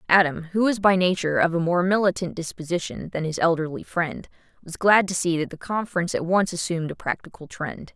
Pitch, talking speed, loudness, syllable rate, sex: 175 Hz, 205 wpm, -23 LUFS, 6.0 syllables/s, female